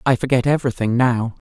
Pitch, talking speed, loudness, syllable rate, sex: 125 Hz, 160 wpm, -18 LUFS, 6.3 syllables/s, male